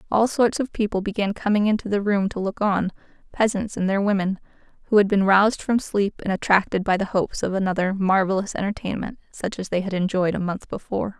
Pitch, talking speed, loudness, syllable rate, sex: 200 Hz, 210 wpm, -22 LUFS, 5.9 syllables/s, female